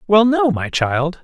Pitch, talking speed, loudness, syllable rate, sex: 170 Hz, 195 wpm, -16 LUFS, 3.7 syllables/s, male